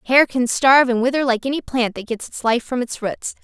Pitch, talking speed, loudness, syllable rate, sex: 245 Hz, 260 wpm, -18 LUFS, 5.6 syllables/s, female